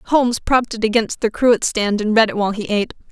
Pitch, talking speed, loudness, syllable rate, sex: 220 Hz, 250 wpm, -17 LUFS, 6.2 syllables/s, female